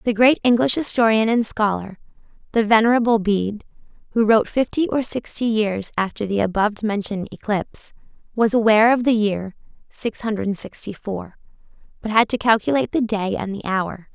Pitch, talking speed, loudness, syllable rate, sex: 215 Hz, 160 wpm, -20 LUFS, 5.3 syllables/s, female